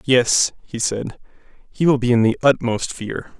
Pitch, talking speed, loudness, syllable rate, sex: 120 Hz, 175 wpm, -19 LUFS, 4.1 syllables/s, male